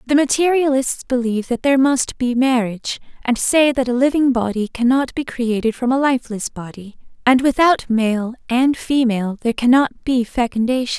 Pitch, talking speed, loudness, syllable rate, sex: 250 Hz, 165 wpm, -18 LUFS, 5.3 syllables/s, female